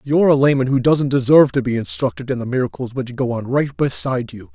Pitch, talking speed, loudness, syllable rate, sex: 130 Hz, 235 wpm, -18 LUFS, 6.3 syllables/s, male